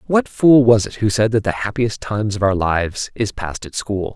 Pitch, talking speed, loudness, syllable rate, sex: 105 Hz, 245 wpm, -18 LUFS, 5.3 syllables/s, male